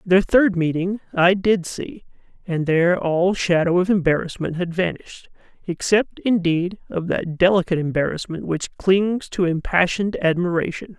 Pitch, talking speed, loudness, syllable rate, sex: 180 Hz, 135 wpm, -20 LUFS, 4.8 syllables/s, male